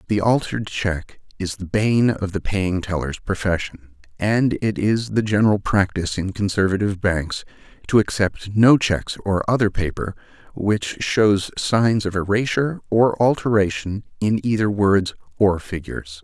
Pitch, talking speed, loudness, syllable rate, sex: 100 Hz, 145 wpm, -20 LUFS, 4.5 syllables/s, male